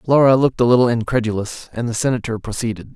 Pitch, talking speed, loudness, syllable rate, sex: 120 Hz, 185 wpm, -18 LUFS, 6.8 syllables/s, male